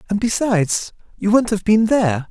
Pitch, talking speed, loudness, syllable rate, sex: 205 Hz, 180 wpm, -17 LUFS, 5.4 syllables/s, male